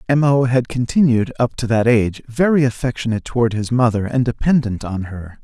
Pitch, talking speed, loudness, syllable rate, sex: 120 Hz, 190 wpm, -17 LUFS, 5.6 syllables/s, male